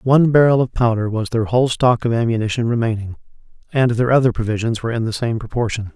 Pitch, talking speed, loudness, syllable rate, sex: 115 Hz, 200 wpm, -18 LUFS, 6.5 syllables/s, male